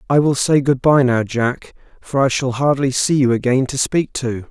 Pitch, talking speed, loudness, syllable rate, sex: 130 Hz, 225 wpm, -17 LUFS, 4.8 syllables/s, male